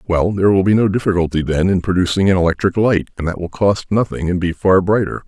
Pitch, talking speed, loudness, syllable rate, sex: 95 Hz, 240 wpm, -16 LUFS, 6.2 syllables/s, male